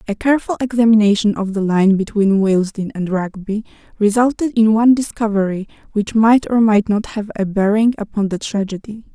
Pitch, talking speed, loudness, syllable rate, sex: 210 Hz, 165 wpm, -16 LUFS, 5.5 syllables/s, female